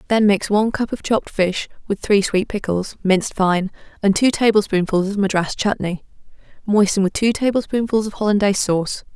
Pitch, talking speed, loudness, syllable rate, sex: 200 Hz, 170 wpm, -19 LUFS, 5.6 syllables/s, female